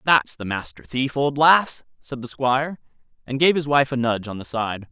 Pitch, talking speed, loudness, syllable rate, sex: 130 Hz, 220 wpm, -21 LUFS, 5.0 syllables/s, male